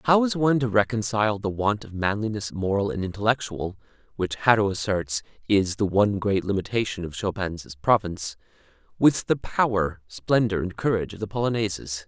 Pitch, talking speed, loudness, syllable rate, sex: 105 Hz, 160 wpm, -24 LUFS, 5.5 syllables/s, male